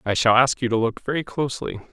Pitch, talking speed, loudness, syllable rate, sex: 125 Hz, 250 wpm, -21 LUFS, 6.6 syllables/s, male